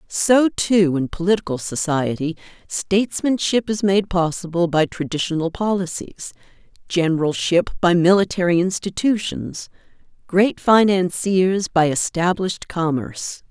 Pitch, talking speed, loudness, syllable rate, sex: 180 Hz, 95 wpm, -19 LUFS, 4.4 syllables/s, female